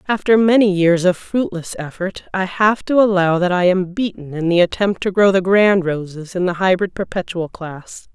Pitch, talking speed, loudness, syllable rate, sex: 185 Hz, 200 wpm, -17 LUFS, 4.9 syllables/s, female